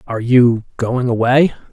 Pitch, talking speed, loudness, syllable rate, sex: 125 Hz, 140 wpm, -15 LUFS, 4.6 syllables/s, male